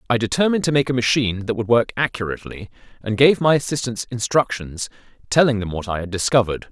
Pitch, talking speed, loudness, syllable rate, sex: 120 Hz, 190 wpm, -20 LUFS, 6.7 syllables/s, male